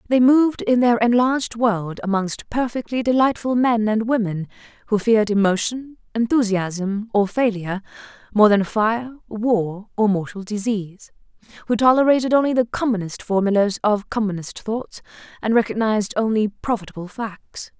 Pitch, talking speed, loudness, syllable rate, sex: 220 Hz, 130 wpm, -20 LUFS, 4.9 syllables/s, female